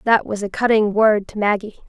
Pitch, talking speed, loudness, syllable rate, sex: 210 Hz, 225 wpm, -18 LUFS, 5.5 syllables/s, female